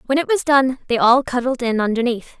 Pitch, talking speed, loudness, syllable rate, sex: 255 Hz, 225 wpm, -18 LUFS, 5.6 syllables/s, female